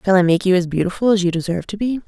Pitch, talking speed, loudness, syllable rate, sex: 190 Hz, 320 wpm, -18 LUFS, 7.8 syllables/s, female